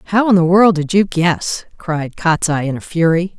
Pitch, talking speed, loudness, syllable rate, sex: 170 Hz, 215 wpm, -15 LUFS, 4.6 syllables/s, female